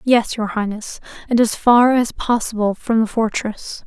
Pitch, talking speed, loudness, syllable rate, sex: 225 Hz, 170 wpm, -18 LUFS, 4.3 syllables/s, female